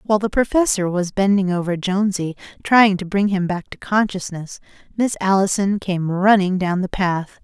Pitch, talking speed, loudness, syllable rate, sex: 190 Hz, 170 wpm, -19 LUFS, 5.0 syllables/s, female